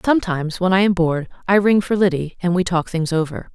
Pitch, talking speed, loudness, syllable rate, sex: 180 Hz, 235 wpm, -19 LUFS, 6.2 syllables/s, female